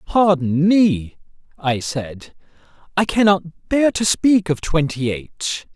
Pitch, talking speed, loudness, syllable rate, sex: 165 Hz, 125 wpm, -18 LUFS, 3.3 syllables/s, male